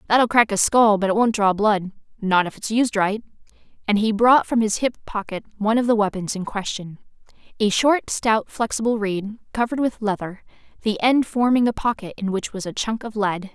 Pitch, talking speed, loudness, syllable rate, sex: 215 Hz, 200 wpm, -21 LUFS, 5.3 syllables/s, female